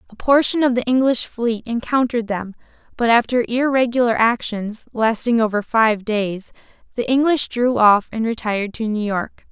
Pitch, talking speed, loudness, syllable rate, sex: 230 Hz, 160 wpm, -19 LUFS, 4.8 syllables/s, female